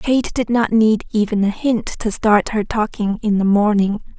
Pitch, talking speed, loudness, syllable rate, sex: 215 Hz, 200 wpm, -17 LUFS, 4.4 syllables/s, female